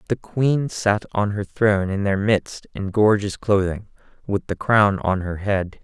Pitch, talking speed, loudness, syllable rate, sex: 100 Hz, 185 wpm, -21 LUFS, 4.1 syllables/s, male